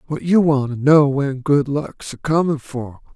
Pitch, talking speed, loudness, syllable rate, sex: 145 Hz, 210 wpm, -18 LUFS, 4.2 syllables/s, male